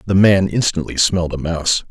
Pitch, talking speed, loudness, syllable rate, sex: 90 Hz, 190 wpm, -16 LUFS, 5.8 syllables/s, male